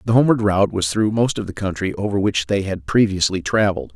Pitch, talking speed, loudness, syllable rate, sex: 100 Hz, 230 wpm, -19 LUFS, 6.4 syllables/s, male